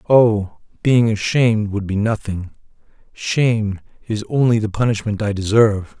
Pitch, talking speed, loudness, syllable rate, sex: 110 Hz, 130 wpm, -18 LUFS, 4.7 syllables/s, male